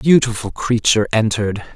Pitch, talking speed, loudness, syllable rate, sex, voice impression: 110 Hz, 135 wpm, -17 LUFS, 6.2 syllables/s, male, masculine, adult-like, tensed, powerful, bright, raspy, friendly, wild, lively, intense